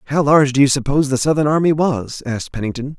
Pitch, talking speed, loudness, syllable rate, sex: 140 Hz, 220 wpm, -16 LUFS, 6.9 syllables/s, male